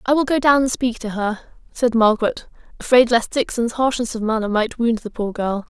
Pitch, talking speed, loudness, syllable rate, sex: 240 Hz, 220 wpm, -19 LUFS, 5.3 syllables/s, female